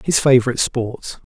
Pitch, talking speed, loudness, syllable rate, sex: 130 Hz, 135 wpm, -17 LUFS, 5.3 syllables/s, male